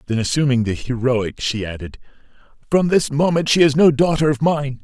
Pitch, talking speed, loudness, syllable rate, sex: 135 Hz, 185 wpm, -18 LUFS, 5.3 syllables/s, male